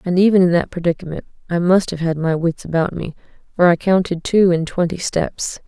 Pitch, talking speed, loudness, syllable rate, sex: 175 Hz, 210 wpm, -18 LUFS, 5.5 syllables/s, female